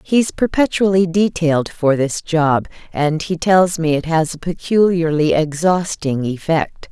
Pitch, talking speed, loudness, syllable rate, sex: 165 Hz, 140 wpm, -17 LUFS, 4.1 syllables/s, female